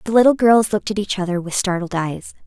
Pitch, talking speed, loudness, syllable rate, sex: 195 Hz, 245 wpm, -18 LUFS, 6.3 syllables/s, female